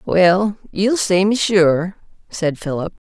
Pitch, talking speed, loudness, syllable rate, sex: 190 Hz, 135 wpm, -17 LUFS, 3.4 syllables/s, female